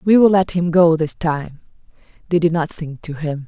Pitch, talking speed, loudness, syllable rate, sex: 165 Hz, 205 wpm, -17 LUFS, 4.8 syllables/s, female